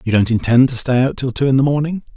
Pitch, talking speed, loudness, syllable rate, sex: 130 Hz, 305 wpm, -15 LUFS, 6.6 syllables/s, male